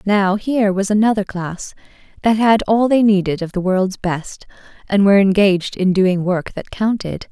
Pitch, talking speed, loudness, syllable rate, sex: 200 Hz, 180 wpm, -16 LUFS, 4.8 syllables/s, female